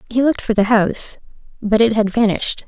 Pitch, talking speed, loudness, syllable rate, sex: 220 Hz, 200 wpm, -17 LUFS, 6.3 syllables/s, female